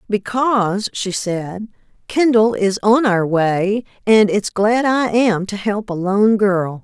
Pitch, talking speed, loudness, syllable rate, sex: 205 Hz, 160 wpm, -16 LUFS, 3.5 syllables/s, female